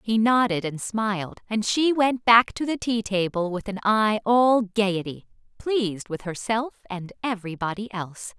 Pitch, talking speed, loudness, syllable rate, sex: 210 Hz, 165 wpm, -23 LUFS, 4.6 syllables/s, female